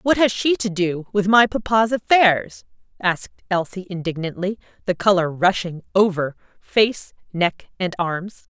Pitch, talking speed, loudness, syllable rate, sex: 195 Hz, 140 wpm, -20 LUFS, 4.3 syllables/s, female